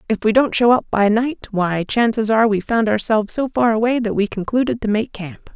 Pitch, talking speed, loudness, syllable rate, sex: 220 Hz, 240 wpm, -18 LUFS, 5.5 syllables/s, female